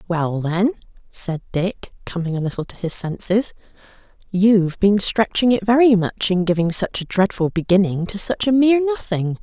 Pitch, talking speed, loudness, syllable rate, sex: 195 Hz, 170 wpm, -19 LUFS, 5.0 syllables/s, female